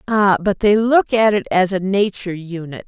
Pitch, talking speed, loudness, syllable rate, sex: 200 Hz, 210 wpm, -16 LUFS, 5.0 syllables/s, female